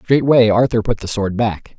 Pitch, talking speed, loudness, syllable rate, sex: 115 Hz, 200 wpm, -16 LUFS, 4.6 syllables/s, male